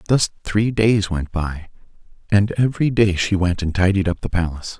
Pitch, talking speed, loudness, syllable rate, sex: 95 Hz, 190 wpm, -19 LUFS, 5.2 syllables/s, male